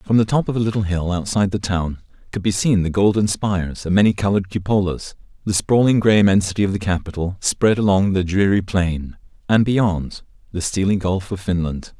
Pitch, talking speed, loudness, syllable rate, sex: 95 Hz, 195 wpm, -19 LUFS, 5.5 syllables/s, male